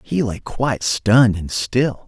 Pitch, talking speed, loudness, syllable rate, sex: 110 Hz, 175 wpm, -18 LUFS, 4.1 syllables/s, male